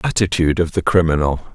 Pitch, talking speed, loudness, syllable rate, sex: 85 Hz, 155 wpm, -17 LUFS, 6.5 syllables/s, male